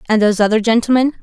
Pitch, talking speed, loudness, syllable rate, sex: 225 Hz, 195 wpm, -14 LUFS, 8.3 syllables/s, female